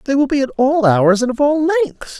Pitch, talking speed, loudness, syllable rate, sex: 270 Hz, 275 wpm, -15 LUFS, 5.3 syllables/s, female